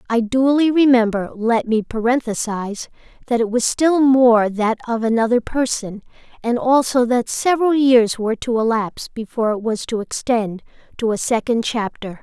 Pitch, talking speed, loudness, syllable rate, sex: 235 Hz, 155 wpm, -18 LUFS, 5.0 syllables/s, female